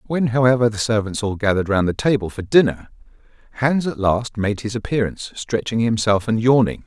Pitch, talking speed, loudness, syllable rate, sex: 115 Hz, 185 wpm, -19 LUFS, 5.7 syllables/s, male